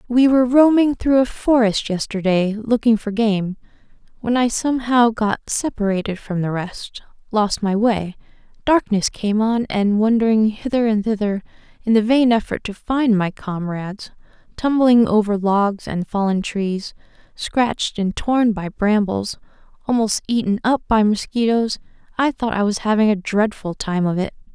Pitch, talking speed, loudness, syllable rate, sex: 220 Hz, 155 wpm, -19 LUFS, 4.5 syllables/s, female